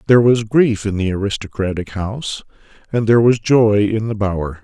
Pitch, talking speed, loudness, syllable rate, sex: 105 Hz, 180 wpm, -17 LUFS, 5.6 syllables/s, male